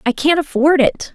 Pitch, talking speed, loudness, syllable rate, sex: 295 Hz, 210 wpm, -15 LUFS, 4.9 syllables/s, female